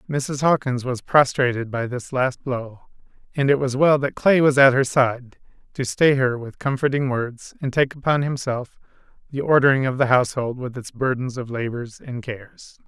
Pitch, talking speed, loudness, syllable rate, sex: 130 Hz, 185 wpm, -21 LUFS, 4.8 syllables/s, male